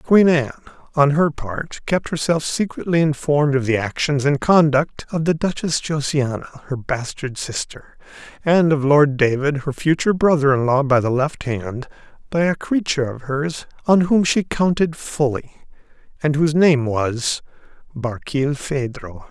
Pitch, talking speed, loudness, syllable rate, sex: 145 Hz, 150 wpm, -19 LUFS, 4.5 syllables/s, male